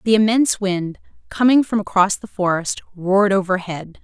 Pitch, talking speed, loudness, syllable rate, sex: 200 Hz, 150 wpm, -18 LUFS, 5.1 syllables/s, female